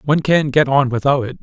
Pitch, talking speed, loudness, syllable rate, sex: 140 Hz, 255 wpm, -15 LUFS, 6.2 syllables/s, male